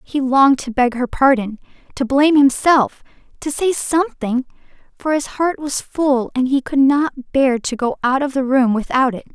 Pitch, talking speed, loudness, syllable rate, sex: 270 Hz, 195 wpm, -17 LUFS, 4.7 syllables/s, female